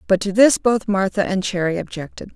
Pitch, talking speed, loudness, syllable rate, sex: 200 Hz, 205 wpm, -18 LUFS, 5.5 syllables/s, female